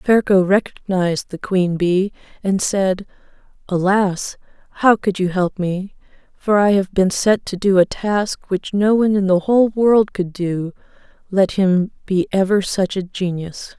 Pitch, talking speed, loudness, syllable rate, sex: 190 Hz, 165 wpm, -18 LUFS, 4.2 syllables/s, female